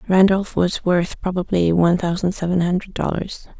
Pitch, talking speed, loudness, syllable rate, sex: 180 Hz, 150 wpm, -19 LUFS, 5.1 syllables/s, female